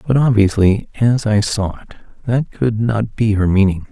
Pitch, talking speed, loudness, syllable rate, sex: 110 Hz, 185 wpm, -16 LUFS, 4.7 syllables/s, male